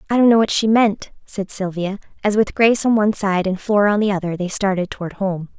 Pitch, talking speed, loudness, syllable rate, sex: 200 Hz, 245 wpm, -18 LUFS, 6.1 syllables/s, female